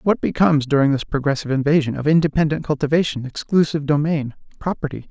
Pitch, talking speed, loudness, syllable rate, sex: 150 Hz, 140 wpm, -19 LUFS, 6.7 syllables/s, male